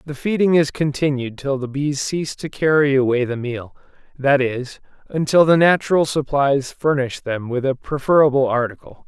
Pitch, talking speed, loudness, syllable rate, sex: 140 Hz, 165 wpm, -19 LUFS, 4.9 syllables/s, male